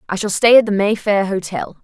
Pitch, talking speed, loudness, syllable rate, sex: 200 Hz, 230 wpm, -15 LUFS, 5.6 syllables/s, female